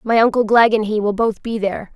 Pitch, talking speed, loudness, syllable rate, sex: 215 Hz, 275 wpm, -17 LUFS, 6.0 syllables/s, female